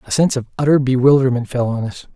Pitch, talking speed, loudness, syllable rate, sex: 130 Hz, 225 wpm, -16 LUFS, 7.0 syllables/s, male